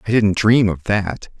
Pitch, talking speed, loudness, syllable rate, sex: 105 Hz, 215 wpm, -17 LUFS, 4.2 syllables/s, male